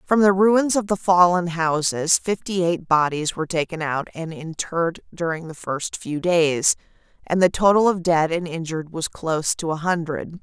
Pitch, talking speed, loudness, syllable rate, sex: 170 Hz, 185 wpm, -21 LUFS, 4.7 syllables/s, female